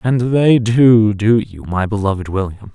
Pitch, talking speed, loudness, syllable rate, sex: 110 Hz, 175 wpm, -14 LUFS, 4.2 syllables/s, male